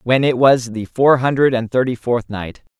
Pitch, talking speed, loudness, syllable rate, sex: 125 Hz, 215 wpm, -16 LUFS, 4.7 syllables/s, male